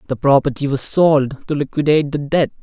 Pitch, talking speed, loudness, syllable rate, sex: 140 Hz, 185 wpm, -17 LUFS, 5.6 syllables/s, male